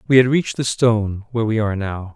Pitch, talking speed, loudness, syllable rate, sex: 110 Hz, 250 wpm, -19 LUFS, 6.8 syllables/s, male